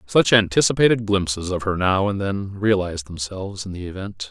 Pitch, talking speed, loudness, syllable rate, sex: 95 Hz, 180 wpm, -21 LUFS, 5.5 syllables/s, male